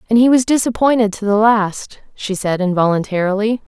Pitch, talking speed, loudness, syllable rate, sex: 215 Hz, 160 wpm, -15 LUFS, 5.4 syllables/s, female